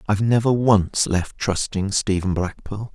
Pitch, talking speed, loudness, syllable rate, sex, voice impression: 100 Hz, 165 wpm, -20 LUFS, 4.3 syllables/s, male, very masculine, adult-like, cool, slightly sincere